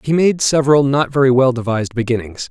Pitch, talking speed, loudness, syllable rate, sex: 130 Hz, 190 wpm, -15 LUFS, 6.2 syllables/s, male